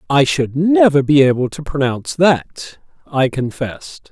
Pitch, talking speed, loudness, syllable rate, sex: 145 Hz, 145 wpm, -15 LUFS, 4.3 syllables/s, male